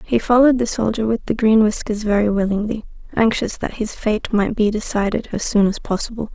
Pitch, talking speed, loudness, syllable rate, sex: 215 Hz, 200 wpm, -19 LUFS, 5.6 syllables/s, female